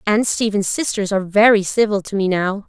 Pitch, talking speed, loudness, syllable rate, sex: 205 Hz, 200 wpm, -17 LUFS, 5.5 syllables/s, female